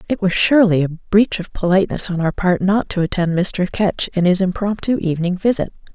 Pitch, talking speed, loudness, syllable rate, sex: 190 Hz, 200 wpm, -17 LUFS, 5.8 syllables/s, female